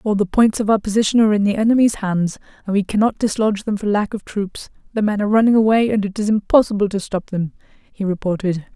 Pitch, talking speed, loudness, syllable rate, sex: 205 Hz, 235 wpm, -18 LUFS, 6.4 syllables/s, female